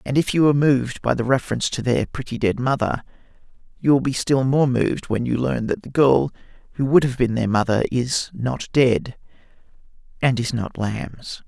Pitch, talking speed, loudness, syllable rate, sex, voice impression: 130 Hz, 200 wpm, -21 LUFS, 5.2 syllables/s, male, very masculine, very middle-aged, thick, tensed, slightly powerful, bright, slightly hard, clear, fluent, slightly raspy, slightly cool, intellectual, slightly refreshing, slightly sincere, calm, slightly mature, slightly friendly, reassuring, unique, slightly elegant, wild, slightly sweet, lively, slightly strict, slightly intense, slightly sharp